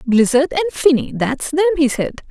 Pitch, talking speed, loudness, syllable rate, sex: 290 Hz, 180 wpm, -16 LUFS, 5.7 syllables/s, female